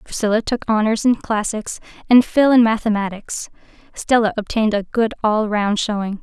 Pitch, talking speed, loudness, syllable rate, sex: 220 Hz, 155 wpm, -18 LUFS, 5.1 syllables/s, female